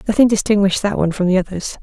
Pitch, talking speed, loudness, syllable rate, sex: 195 Hz, 230 wpm, -16 LUFS, 7.9 syllables/s, female